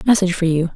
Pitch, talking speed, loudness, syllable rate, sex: 180 Hz, 240 wpm, -17 LUFS, 8.2 syllables/s, female